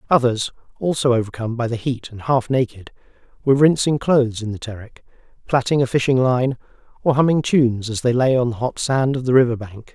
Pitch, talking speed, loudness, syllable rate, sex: 125 Hz, 200 wpm, -19 LUFS, 5.9 syllables/s, male